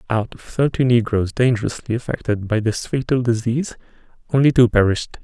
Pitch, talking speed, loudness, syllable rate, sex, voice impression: 120 Hz, 150 wpm, -19 LUFS, 5.9 syllables/s, male, masculine, adult-like, slightly relaxed, soft, slightly halting, calm, friendly, reassuring, kind